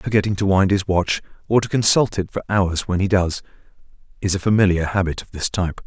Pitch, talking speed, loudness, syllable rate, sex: 95 Hz, 215 wpm, -20 LUFS, 5.9 syllables/s, male